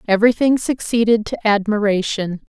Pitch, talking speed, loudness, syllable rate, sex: 215 Hz, 95 wpm, -17 LUFS, 5.2 syllables/s, female